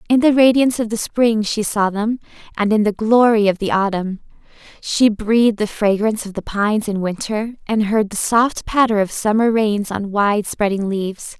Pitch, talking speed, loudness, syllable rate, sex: 215 Hz, 190 wpm, -17 LUFS, 5.0 syllables/s, female